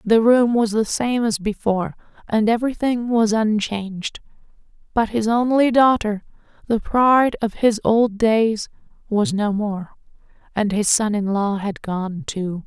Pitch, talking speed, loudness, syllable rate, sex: 215 Hz, 150 wpm, -19 LUFS, 4.2 syllables/s, female